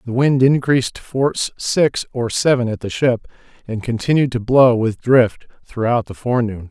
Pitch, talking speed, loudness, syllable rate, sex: 125 Hz, 180 wpm, -17 LUFS, 4.9 syllables/s, male